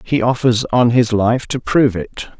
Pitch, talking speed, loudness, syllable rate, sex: 120 Hz, 200 wpm, -15 LUFS, 4.5 syllables/s, male